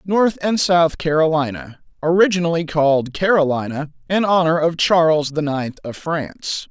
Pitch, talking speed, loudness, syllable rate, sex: 160 Hz, 125 wpm, -18 LUFS, 4.7 syllables/s, male